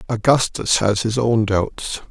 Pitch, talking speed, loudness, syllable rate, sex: 110 Hz, 145 wpm, -18 LUFS, 3.8 syllables/s, male